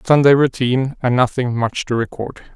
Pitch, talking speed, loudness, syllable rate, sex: 125 Hz, 165 wpm, -17 LUFS, 5.0 syllables/s, male